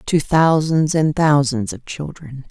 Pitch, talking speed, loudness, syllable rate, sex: 145 Hz, 145 wpm, -17 LUFS, 3.8 syllables/s, female